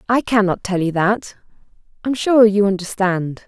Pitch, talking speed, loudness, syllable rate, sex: 205 Hz, 175 wpm, -17 LUFS, 5.0 syllables/s, female